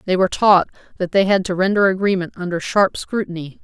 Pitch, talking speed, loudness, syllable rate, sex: 185 Hz, 200 wpm, -18 LUFS, 6.0 syllables/s, female